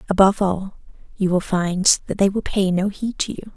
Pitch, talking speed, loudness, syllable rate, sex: 190 Hz, 220 wpm, -20 LUFS, 5.2 syllables/s, female